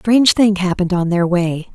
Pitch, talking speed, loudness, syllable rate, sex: 190 Hz, 240 wpm, -15 LUFS, 6.2 syllables/s, female